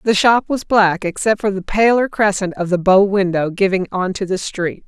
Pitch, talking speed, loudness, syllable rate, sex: 195 Hz, 210 wpm, -16 LUFS, 4.9 syllables/s, female